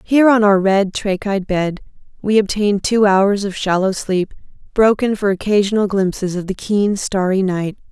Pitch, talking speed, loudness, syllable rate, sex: 200 Hz, 165 wpm, -16 LUFS, 4.9 syllables/s, female